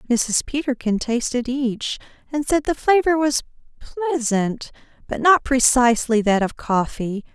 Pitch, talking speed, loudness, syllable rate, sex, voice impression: 255 Hz, 130 wpm, -20 LUFS, 4.5 syllables/s, female, feminine, adult-like, clear, fluent, slightly refreshing, slightly calm, elegant